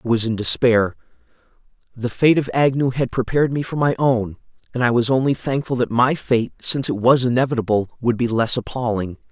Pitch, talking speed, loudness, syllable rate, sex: 125 Hz, 195 wpm, -19 LUFS, 5.7 syllables/s, male